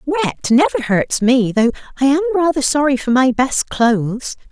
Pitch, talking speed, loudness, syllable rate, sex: 265 Hz, 175 wpm, -16 LUFS, 4.7 syllables/s, female